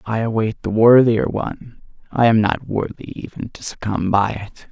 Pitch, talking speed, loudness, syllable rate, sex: 110 Hz, 180 wpm, -18 LUFS, 4.7 syllables/s, male